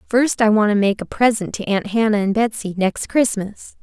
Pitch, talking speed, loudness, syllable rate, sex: 215 Hz, 220 wpm, -18 LUFS, 5.0 syllables/s, female